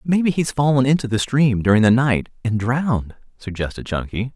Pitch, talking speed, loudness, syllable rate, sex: 120 Hz, 180 wpm, -19 LUFS, 5.3 syllables/s, male